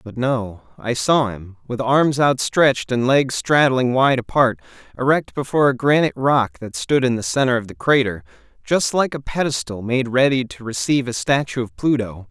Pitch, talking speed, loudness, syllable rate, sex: 125 Hz, 185 wpm, -19 LUFS, 5.0 syllables/s, male